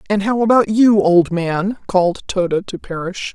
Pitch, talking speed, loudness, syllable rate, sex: 195 Hz, 180 wpm, -16 LUFS, 4.4 syllables/s, female